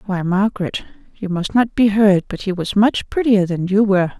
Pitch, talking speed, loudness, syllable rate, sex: 200 Hz, 215 wpm, -17 LUFS, 5.1 syllables/s, female